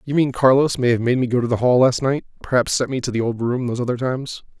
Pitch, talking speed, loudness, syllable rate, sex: 125 Hz, 300 wpm, -19 LUFS, 6.7 syllables/s, male